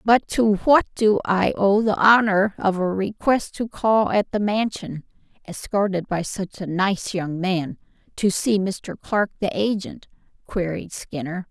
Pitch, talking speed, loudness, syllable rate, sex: 200 Hz, 160 wpm, -21 LUFS, 3.9 syllables/s, female